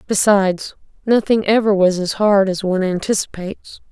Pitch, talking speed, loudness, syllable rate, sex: 200 Hz, 140 wpm, -16 LUFS, 5.3 syllables/s, female